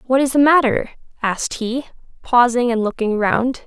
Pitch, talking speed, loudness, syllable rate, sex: 245 Hz, 165 wpm, -17 LUFS, 4.9 syllables/s, female